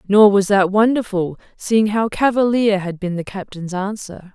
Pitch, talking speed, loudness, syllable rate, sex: 200 Hz, 165 wpm, -17 LUFS, 4.5 syllables/s, female